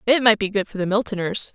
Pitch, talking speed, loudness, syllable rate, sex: 210 Hz, 270 wpm, -20 LUFS, 6.4 syllables/s, female